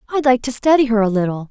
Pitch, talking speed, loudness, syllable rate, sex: 240 Hz, 280 wpm, -16 LUFS, 6.8 syllables/s, female